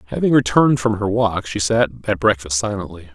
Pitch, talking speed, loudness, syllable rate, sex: 95 Hz, 190 wpm, -18 LUFS, 5.9 syllables/s, male